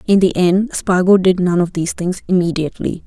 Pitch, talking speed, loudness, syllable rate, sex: 180 Hz, 195 wpm, -16 LUFS, 5.7 syllables/s, female